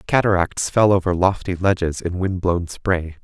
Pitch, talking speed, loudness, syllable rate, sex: 90 Hz, 165 wpm, -20 LUFS, 4.6 syllables/s, male